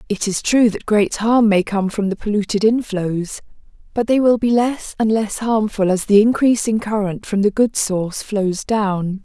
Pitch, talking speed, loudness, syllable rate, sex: 210 Hz, 195 wpm, -17 LUFS, 4.5 syllables/s, female